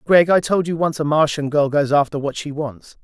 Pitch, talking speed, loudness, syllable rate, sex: 150 Hz, 255 wpm, -18 LUFS, 5.2 syllables/s, male